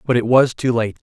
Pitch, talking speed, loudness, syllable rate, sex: 120 Hz, 270 wpm, -17 LUFS, 5.5 syllables/s, male